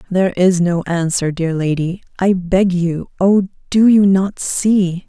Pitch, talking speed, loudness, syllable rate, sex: 185 Hz, 140 wpm, -15 LUFS, 3.7 syllables/s, female